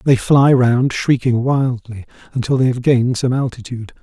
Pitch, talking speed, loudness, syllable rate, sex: 125 Hz, 165 wpm, -15 LUFS, 5.1 syllables/s, male